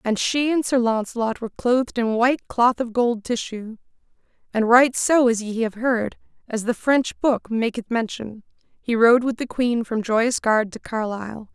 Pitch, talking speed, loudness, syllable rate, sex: 235 Hz, 185 wpm, -21 LUFS, 4.5 syllables/s, female